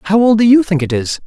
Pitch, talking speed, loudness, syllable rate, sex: 195 Hz, 335 wpm, -12 LUFS, 5.8 syllables/s, male